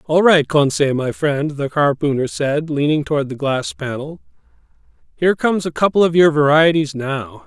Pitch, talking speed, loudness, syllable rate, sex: 150 Hz, 170 wpm, -17 LUFS, 4.9 syllables/s, male